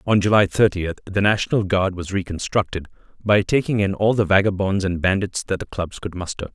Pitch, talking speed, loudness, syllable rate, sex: 95 Hz, 195 wpm, -20 LUFS, 5.6 syllables/s, male